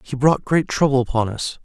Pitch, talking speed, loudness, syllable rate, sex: 135 Hz, 220 wpm, -19 LUFS, 5.3 syllables/s, male